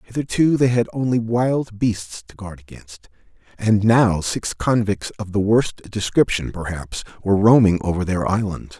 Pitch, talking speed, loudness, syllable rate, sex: 105 Hz, 155 wpm, -19 LUFS, 4.5 syllables/s, male